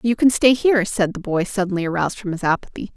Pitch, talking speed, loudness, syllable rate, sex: 205 Hz, 245 wpm, -19 LUFS, 6.7 syllables/s, female